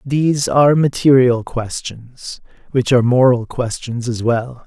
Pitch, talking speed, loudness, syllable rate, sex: 125 Hz, 130 wpm, -16 LUFS, 4.2 syllables/s, male